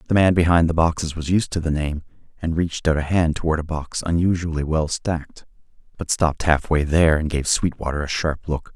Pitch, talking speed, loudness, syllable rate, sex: 80 Hz, 210 wpm, -21 LUFS, 5.8 syllables/s, male